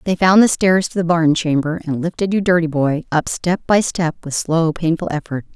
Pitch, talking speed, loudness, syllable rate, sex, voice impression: 170 Hz, 225 wpm, -17 LUFS, 5.1 syllables/s, female, feminine, adult-like, tensed, powerful, bright, clear, fluent, intellectual, friendly, slightly reassuring, elegant, lively, slightly kind